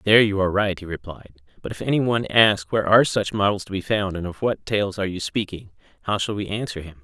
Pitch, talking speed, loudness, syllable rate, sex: 100 Hz, 245 wpm, -22 LUFS, 6.5 syllables/s, male